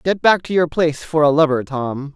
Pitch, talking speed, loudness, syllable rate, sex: 155 Hz, 250 wpm, -17 LUFS, 5.4 syllables/s, male